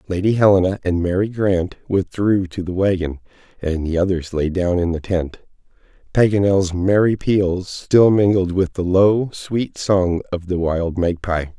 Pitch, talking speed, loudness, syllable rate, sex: 95 Hz, 160 wpm, -18 LUFS, 4.3 syllables/s, male